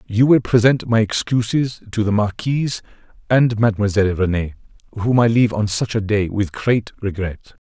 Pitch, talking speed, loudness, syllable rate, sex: 110 Hz, 165 wpm, -18 LUFS, 5.3 syllables/s, male